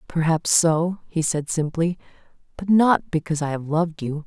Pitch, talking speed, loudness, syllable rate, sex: 165 Hz, 170 wpm, -21 LUFS, 5.1 syllables/s, female